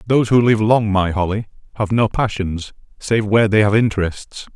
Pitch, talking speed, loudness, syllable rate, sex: 105 Hz, 185 wpm, -17 LUFS, 5.4 syllables/s, male